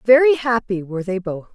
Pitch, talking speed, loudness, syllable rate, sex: 220 Hz, 195 wpm, -19 LUFS, 5.8 syllables/s, female